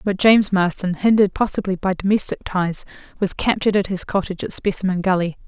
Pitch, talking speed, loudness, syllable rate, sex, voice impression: 190 Hz, 175 wpm, -19 LUFS, 6.2 syllables/s, female, very feminine, slightly young, very adult-like, very thin, slightly tensed, weak, slightly dark, hard, muffled, very fluent, slightly raspy, cute, slightly cool, very intellectual, refreshing, very sincere, slightly calm, very friendly, very reassuring, very unique, elegant, slightly wild, sweet, slightly lively, very kind, slightly intense, modest